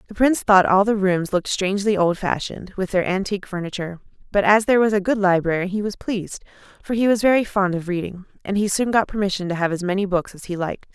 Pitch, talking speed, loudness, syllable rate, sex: 195 Hz, 235 wpm, -20 LUFS, 6.7 syllables/s, female